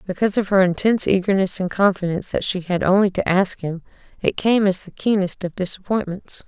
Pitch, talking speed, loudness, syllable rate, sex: 190 Hz, 195 wpm, -20 LUFS, 5.9 syllables/s, female